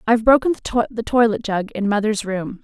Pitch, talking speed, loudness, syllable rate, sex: 220 Hz, 180 wpm, -19 LUFS, 5.8 syllables/s, female